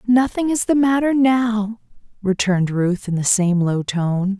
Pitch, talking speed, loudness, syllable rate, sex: 210 Hz, 165 wpm, -18 LUFS, 4.2 syllables/s, female